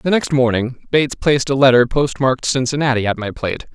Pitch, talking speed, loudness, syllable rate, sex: 130 Hz, 190 wpm, -16 LUFS, 6.1 syllables/s, male